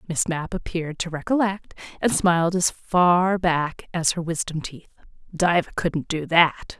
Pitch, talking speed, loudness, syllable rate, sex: 170 Hz, 160 wpm, -22 LUFS, 4.1 syllables/s, female